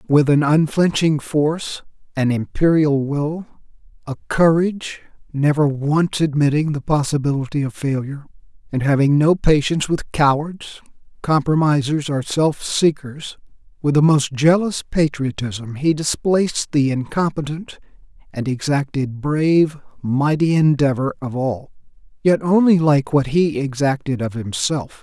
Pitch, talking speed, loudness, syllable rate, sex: 145 Hz, 120 wpm, -18 LUFS, 4.4 syllables/s, male